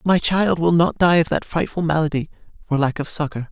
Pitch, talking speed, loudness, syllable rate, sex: 160 Hz, 220 wpm, -19 LUFS, 5.7 syllables/s, male